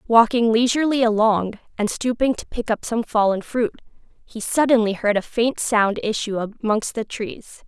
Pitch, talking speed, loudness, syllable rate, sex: 225 Hz, 165 wpm, -21 LUFS, 4.7 syllables/s, female